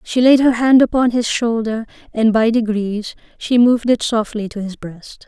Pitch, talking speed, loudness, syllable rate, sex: 230 Hz, 195 wpm, -16 LUFS, 4.7 syllables/s, female